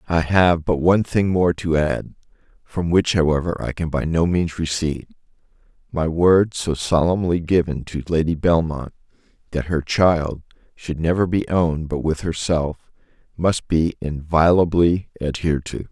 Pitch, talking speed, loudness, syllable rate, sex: 80 Hz, 155 wpm, -20 LUFS, 4.5 syllables/s, male